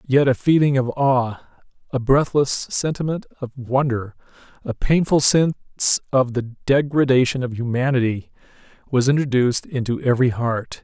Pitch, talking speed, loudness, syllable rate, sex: 130 Hz, 125 wpm, -20 LUFS, 5.0 syllables/s, male